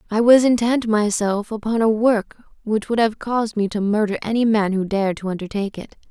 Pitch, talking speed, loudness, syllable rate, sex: 215 Hz, 205 wpm, -19 LUFS, 5.7 syllables/s, female